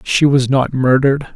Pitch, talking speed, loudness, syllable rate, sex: 135 Hz, 175 wpm, -14 LUFS, 4.8 syllables/s, male